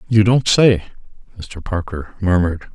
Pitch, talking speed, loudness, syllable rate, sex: 95 Hz, 130 wpm, -17 LUFS, 4.8 syllables/s, male